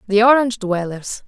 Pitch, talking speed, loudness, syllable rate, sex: 215 Hz, 140 wpm, -17 LUFS, 5.4 syllables/s, female